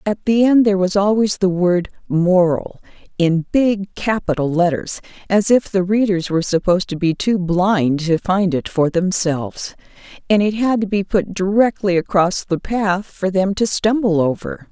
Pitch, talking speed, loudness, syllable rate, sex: 190 Hz, 175 wpm, -17 LUFS, 4.6 syllables/s, female